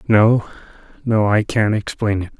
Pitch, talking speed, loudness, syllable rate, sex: 105 Hz, 150 wpm, -17 LUFS, 4.4 syllables/s, male